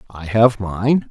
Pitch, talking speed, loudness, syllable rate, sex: 110 Hz, 165 wpm, -17 LUFS, 3.3 syllables/s, male